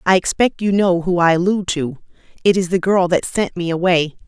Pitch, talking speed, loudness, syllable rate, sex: 180 Hz, 225 wpm, -17 LUFS, 5.5 syllables/s, female